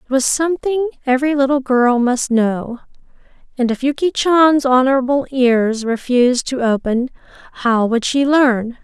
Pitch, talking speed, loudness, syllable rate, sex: 260 Hz, 145 wpm, -16 LUFS, 4.7 syllables/s, female